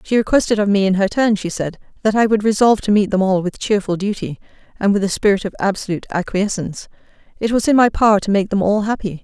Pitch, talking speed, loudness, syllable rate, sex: 200 Hz, 240 wpm, -17 LUFS, 6.5 syllables/s, female